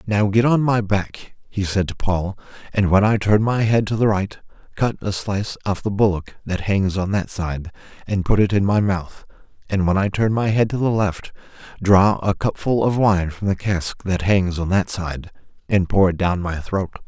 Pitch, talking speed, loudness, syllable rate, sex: 100 Hz, 220 wpm, -20 LUFS, 4.7 syllables/s, male